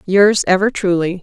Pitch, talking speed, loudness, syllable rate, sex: 190 Hz, 145 wpm, -14 LUFS, 4.4 syllables/s, female